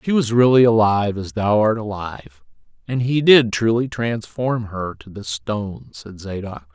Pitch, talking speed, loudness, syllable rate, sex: 110 Hz, 170 wpm, -19 LUFS, 4.6 syllables/s, male